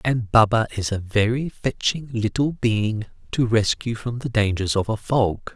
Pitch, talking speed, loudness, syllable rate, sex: 115 Hz, 175 wpm, -22 LUFS, 4.3 syllables/s, male